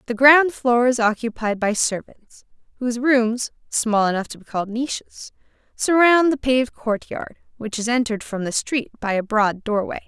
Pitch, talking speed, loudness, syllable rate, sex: 235 Hz, 165 wpm, -20 LUFS, 4.9 syllables/s, female